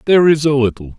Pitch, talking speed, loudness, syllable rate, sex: 130 Hz, 245 wpm, -14 LUFS, 7.1 syllables/s, male